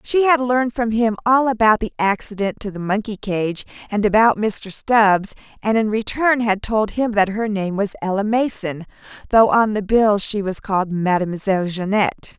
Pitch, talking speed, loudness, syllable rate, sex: 210 Hz, 185 wpm, -19 LUFS, 4.9 syllables/s, female